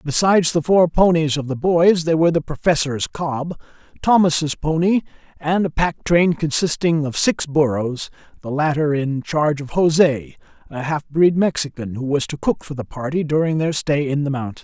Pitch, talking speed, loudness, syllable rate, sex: 150 Hz, 185 wpm, -19 LUFS, 4.9 syllables/s, male